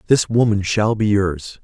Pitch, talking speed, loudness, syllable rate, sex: 105 Hz, 185 wpm, -18 LUFS, 4.2 syllables/s, male